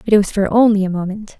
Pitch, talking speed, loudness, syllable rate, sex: 205 Hz, 300 wpm, -16 LUFS, 7.0 syllables/s, female